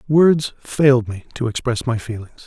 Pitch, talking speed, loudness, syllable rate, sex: 125 Hz, 170 wpm, -18 LUFS, 4.8 syllables/s, male